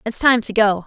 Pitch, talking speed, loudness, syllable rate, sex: 220 Hz, 280 wpm, -16 LUFS, 5.2 syllables/s, female